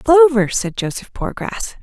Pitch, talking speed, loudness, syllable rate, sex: 235 Hz, 130 wpm, -17 LUFS, 4.2 syllables/s, female